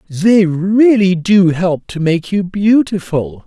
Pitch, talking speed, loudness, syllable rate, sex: 185 Hz, 140 wpm, -13 LUFS, 3.3 syllables/s, male